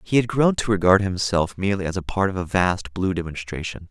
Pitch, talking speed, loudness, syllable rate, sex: 95 Hz, 230 wpm, -22 LUFS, 5.8 syllables/s, male